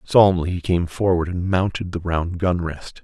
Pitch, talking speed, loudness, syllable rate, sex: 90 Hz, 180 wpm, -21 LUFS, 4.8 syllables/s, male